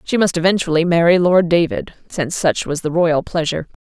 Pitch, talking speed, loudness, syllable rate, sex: 170 Hz, 190 wpm, -16 LUFS, 5.7 syllables/s, female